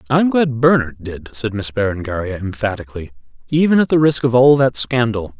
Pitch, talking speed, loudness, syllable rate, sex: 120 Hz, 190 wpm, -16 LUFS, 5.7 syllables/s, male